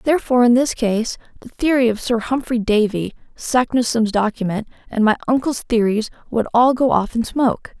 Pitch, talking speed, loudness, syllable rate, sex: 235 Hz, 170 wpm, -18 LUFS, 5.3 syllables/s, female